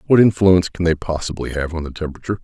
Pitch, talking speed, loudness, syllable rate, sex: 85 Hz, 220 wpm, -18 LUFS, 7.6 syllables/s, male